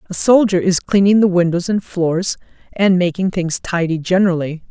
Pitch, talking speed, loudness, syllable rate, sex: 180 Hz, 165 wpm, -16 LUFS, 5.1 syllables/s, female